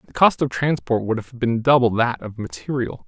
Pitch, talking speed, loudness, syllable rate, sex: 120 Hz, 215 wpm, -21 LUFS, 5.2 syllables/s, male